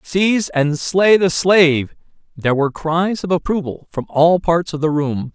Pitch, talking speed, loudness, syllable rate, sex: 165 Hz, 180 wpm, -16 LUFS, 4.6 syllables/s, male